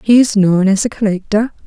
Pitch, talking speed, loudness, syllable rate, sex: 210 Hz, 215 wpm, -13 LUFS, 5.5 syllables/s, female